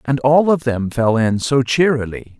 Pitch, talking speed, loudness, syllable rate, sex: 130 Hz, 200 wpm, -16 LUFS, 4.4 syllables/s, male